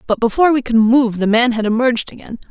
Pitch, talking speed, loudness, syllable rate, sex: 235 Hz, 240 wpm, -15 LUFS, 6.6 syllables/s, female